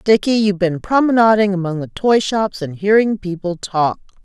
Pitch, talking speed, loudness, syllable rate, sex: 195 Hz, 170 wpm, -16 LUFS, 5.0 syllables/s, female